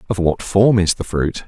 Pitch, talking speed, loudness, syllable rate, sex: 90 Hz, 245 wpm, -17 LUFS, 4.7 syllables/s, male